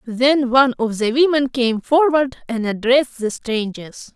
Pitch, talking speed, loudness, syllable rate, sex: 250 Hz, 160 wpm, -18 LUFS, 4.4 syllables/s, female